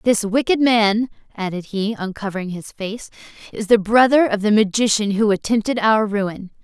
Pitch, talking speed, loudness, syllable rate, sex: 215 Hz, 165 wpm, -18 LUFS, 4.9 syllables/s, female